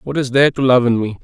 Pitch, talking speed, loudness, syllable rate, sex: 125 Hz, 340 wpm, -14 LUFS, 6.8 syllables/s, male